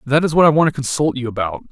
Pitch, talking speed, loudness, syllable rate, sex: 140 Hz, 315 wpm, -16 LUFS, 7.1 syllables/s, male